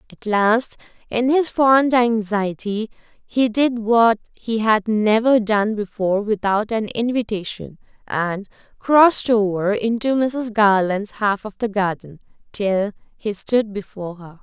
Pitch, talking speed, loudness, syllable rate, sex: 220 Hz, 135 wpm, -19 LUFS, 3.9 syllables/s, female